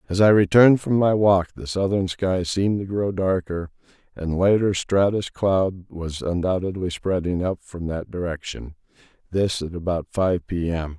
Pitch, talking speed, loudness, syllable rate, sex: 95 Hz, 160 wpm, -22 LUFS, 4.6 syllables/s, male